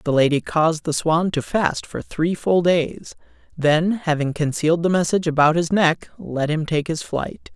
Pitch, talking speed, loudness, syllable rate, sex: 160 Hz, 190 wpm, -20 LUFS, 4.6 syllables/s, male